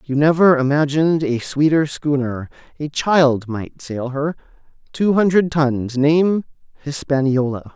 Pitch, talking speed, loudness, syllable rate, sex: 145 Hz, 110 wpm, -18 LUFS, 4.1 syllables/s, male